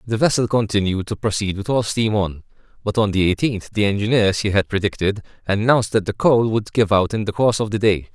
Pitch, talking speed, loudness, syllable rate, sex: 105 Hz, 235 wpm, -19 LUFS, 6.0 syllables/s, male